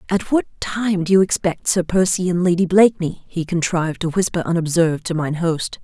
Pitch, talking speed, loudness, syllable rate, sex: 175 Hz, 195 wpm, -19 LUFS, 5.5 syllables/s, female